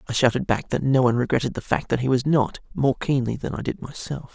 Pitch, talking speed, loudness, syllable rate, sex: 130 Hz, 260 wpm, -23 LUFS, 6.2 syllables/s, male